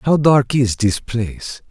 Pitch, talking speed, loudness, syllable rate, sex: 125 Hz, 175 wpm, -17 LUFS, 3.9 syllables/s, male